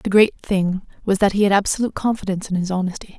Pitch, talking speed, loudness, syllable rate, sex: 195 Hz, 225 wpm, -20 LUFS, 6.7 syllables/s, female